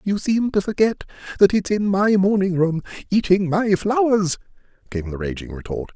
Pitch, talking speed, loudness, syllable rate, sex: 180 Hz, 170 wpm, -20 LUFS, 4.9 syllables/s, male